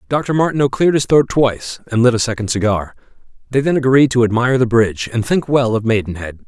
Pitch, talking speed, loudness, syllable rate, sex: 120 Hz, 215 wpm, -15 LUFS, 6.3 syllables/s, male